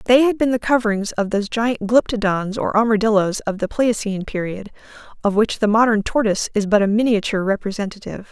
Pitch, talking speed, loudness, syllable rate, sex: 215 Hz, 180 wpm, -19 LUFS, 6.5 syllables/s, female